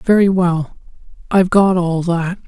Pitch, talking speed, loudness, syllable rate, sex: 180 Hz, 120 wpm, -15 LUFS, 4.4 syllables/s, male